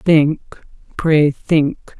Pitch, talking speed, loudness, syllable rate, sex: 155 Hz, 90 wpm, -16 LUFS, 1.9 syllables/s, female